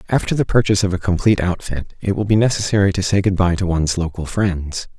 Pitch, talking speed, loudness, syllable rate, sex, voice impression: 95 Hz, 215 wpm, -18 LUFS, 6.4 syllables/s, male, masculine, adult-like, tensed, slightly hard, fluent, slightly raspy, cool, intellectual, slightly friendly, reassuring, wild, kind, slightly modest